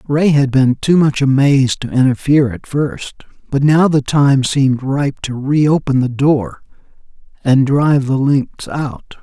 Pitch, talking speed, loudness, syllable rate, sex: 140 Hz, 165 wpm, -14 LUFS, 4.2 syllables/s, male